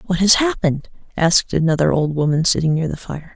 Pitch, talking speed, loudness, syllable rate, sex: 170 Hz, 195 wpm, -17 LUFS, 5.9 syllables/s, female